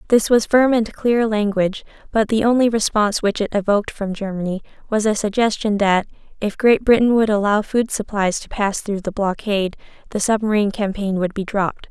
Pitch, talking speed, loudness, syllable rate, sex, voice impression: 210 Hz, 185 wpm, -19 LUFS, 5.6 syllables/s, female, feminine, young, relaxed, soft, raspy, slightly cute, refreshing, calm, slightly friendly, reassuring, kind, modest